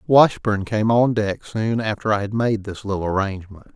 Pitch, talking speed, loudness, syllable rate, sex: 105 Hz, 190 wpm, -20 LUFS, 5.1 syllables/s, male